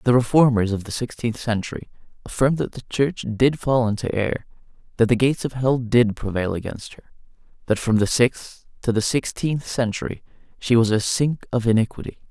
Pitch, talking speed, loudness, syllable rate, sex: 120 Hz, 180 wpm, -21 LUFS, 5.4 syllables/s, male